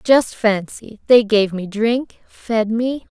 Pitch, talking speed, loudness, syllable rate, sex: 225 Hz, 155 wpm, -17 LUFS, 3.1 syllables/s, female